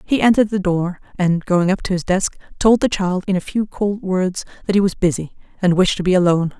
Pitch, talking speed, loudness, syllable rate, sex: 190 Hz, 245 wpm, -18 LUFS, 5.7 syllables/s, female